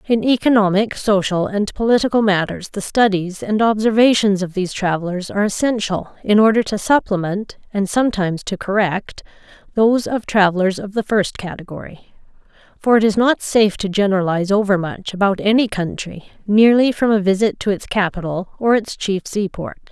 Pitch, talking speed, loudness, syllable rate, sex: 205 Hz, 155 wpm, -17 LUFS, 5.5 syllables/s, female